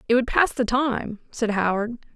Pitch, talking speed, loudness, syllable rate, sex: 230 Hz, 195 wpm, -23 LUFS, 4.6 syllables/s, female